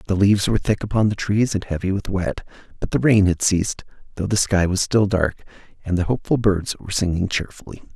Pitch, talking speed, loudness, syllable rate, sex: 100 Hz, 220 wpm, -20 LUFS, 6.2 syllables/s, male